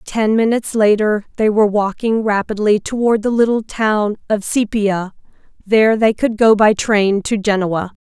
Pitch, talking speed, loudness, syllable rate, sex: 215 Hz, 155 wpm, -15 LUFS, 4.7 syllables/s, female